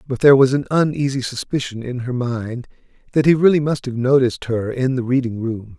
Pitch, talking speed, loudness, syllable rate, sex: 130 Hz, 210 wpm, -18 LUFS, 5.7 syllables/s, male